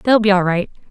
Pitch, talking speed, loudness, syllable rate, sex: 200 Hz, 265 wpm, -16 LUFS, 5.7 syllables/s, female